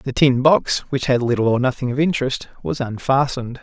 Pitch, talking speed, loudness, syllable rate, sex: 130 Hz, 200 wpm, -19 LUFS, 5.6 syllables/s, male